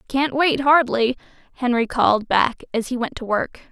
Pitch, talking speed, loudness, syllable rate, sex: 250 Hz, 180 wpm, -20 LUFS, 4.7 syllables/s, female